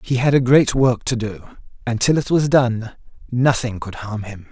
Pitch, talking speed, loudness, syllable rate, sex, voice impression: 120 Hz, 215 wpm, -18 LUFS, 4.6 syllables/s, male, very masculine, very adult-like, very middle-aged, thick, slightly relaxed, slightly weak, slightly dark, slightly soft, slightly clear, slightly fluent, cool, intellectual, sincere, calm, slightly friendly, reassuring, slightly unique, slightly elegant, slightly sweet, kind, modest